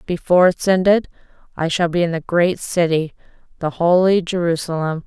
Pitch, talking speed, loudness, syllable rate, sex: 175 Hz, 140 wpm, -18 LUFS, 5.3 syllables/s, female